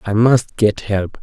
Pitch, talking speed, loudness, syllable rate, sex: 110 Hz, 195 wpm, -16 LUFS, 3.7 syllables/s, male